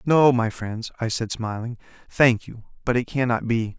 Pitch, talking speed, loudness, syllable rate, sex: 120 Hz, 205 wpm, -23 LUFS, 4.9 syllables/s, male